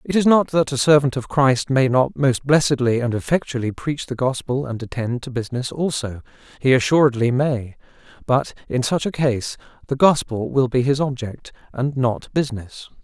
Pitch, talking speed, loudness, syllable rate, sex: 130 Hz, 180 wpm, -20 LUFS, 5.0 syllables/s, male